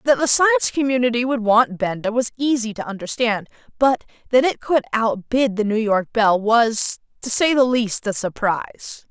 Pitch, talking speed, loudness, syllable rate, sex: 230 Hz, 180 wpm, -19 LUFS, 4.7 syllables/s, female